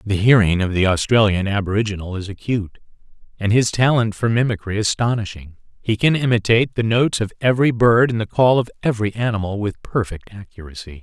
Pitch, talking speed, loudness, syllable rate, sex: 110 Hz, 170 wpm, -18 LUFS, 6.1 syllables/s, male